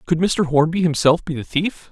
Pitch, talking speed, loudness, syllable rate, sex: 160 Hz, 220 wpm, -19 LUFS, 5.0 syllables/s, male